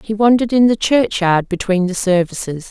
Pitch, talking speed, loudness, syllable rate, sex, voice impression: 200 Hz, 180 wpm, -15 LUFS, 5.4 syllables/s, female, very feminine, adult-like, slightly middle-aged, very thin, very tensed, powerful, bright, hard, very clear, very fluent, cool, intellectual, refreshing, very sincere, slightly calm, friendly, reassuring, very unique, slightly elegant, slightly wild, slightly sweet, very lively, slightly kind, sharp